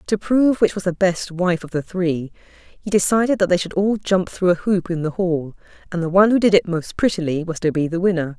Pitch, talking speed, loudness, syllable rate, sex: 180 Hz, 255 wpm, -19 LUFS, 5.7 syllables/s, female